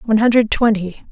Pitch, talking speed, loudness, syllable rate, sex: 220 Hz, 160 wpm, -15 LUFS, 5.8 syllables/s, female